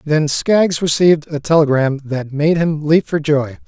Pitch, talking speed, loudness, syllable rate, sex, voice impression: 155 Hz, 180 wpm, -15 LUFS, 4.3 syllables/s, male, very masculine, middle-aged, slightly thick, slightly tensed, powerful, slightly bright, soft, slightly muffled, slightly fluent, slightly cool, intellectual, refreshing, sincere, calm, mature, friendly, reassuring, slightly unique, slightly elegant, wild, slightly sweet, lively, kind, slightly modest